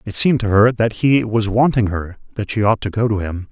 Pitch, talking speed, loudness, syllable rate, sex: 110 Hz, 275 wpm, -17 LUFS, 5.6 syllables/s, male